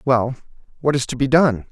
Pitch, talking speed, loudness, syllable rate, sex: 130 Hz, 210 wpm, -19 LUFS, 5.3 syllables/s, male